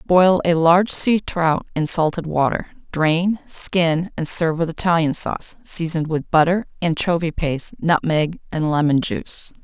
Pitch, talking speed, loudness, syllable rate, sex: 165 Hz, 150 wpm, -19 LUFS, 4.6 syllables/s, female